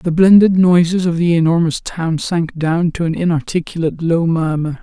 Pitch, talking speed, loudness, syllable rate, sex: 165 Hz, 175 wpm, -15 LUFS, 5.0 syllables/s, male